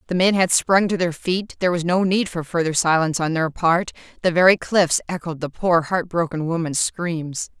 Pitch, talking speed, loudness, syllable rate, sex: 170 Hz, 215 wpm, -20 LUFS, 5.1 syllables/s, female